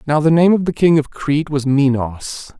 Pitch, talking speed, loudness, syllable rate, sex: 150 Hz, 230 wpm, -15 LUFS, 4.9 syllables/s, male